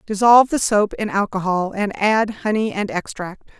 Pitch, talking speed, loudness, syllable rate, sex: 205 Hz, 165 wpm, -18 LUFS, 4.7 syllables/s, female